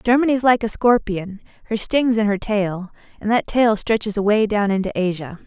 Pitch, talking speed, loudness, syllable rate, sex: 215 Hz, 185 wpm, -19 LUFS, 4.8 syllables/s, female